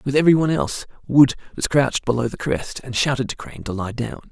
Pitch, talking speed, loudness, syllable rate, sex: 130 Hz, 235 wpm, -20 LUFS, 6.6 syllables/s, male